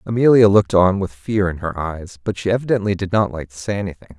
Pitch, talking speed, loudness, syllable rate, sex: 100 Hz, 245 wpm, -18 LUFS, 6.3 syllables/s, male